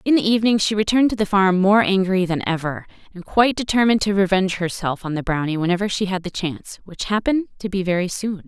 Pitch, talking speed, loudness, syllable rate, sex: 195 Hz, 225 wpm, -20 LUFS, 6.6 syllables/s, female